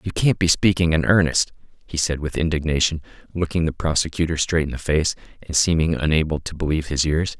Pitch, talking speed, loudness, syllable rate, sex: 80 Hz, 195 wpm, -21 LUFS, 6.0 syllables/s, male